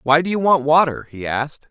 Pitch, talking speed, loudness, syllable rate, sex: 150 Hz, 245 wpm, -17 LUFS, 5.7 syllables/s, male